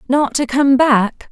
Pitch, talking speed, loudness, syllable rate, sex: 265 Hz, 185 wpm, -14 LUFS, 3.5 syllables/s, female